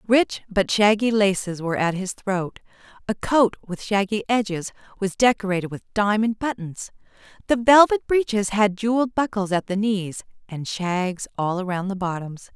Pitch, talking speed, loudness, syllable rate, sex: 205 Hz, 160 wpm, -22 LUFS, 4.8 syllables/s, female